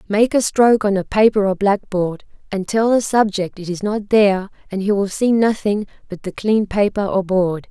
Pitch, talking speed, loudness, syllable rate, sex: 205 Hz, 210 wpm, -17 LUFS, 5.0 syllables/s, female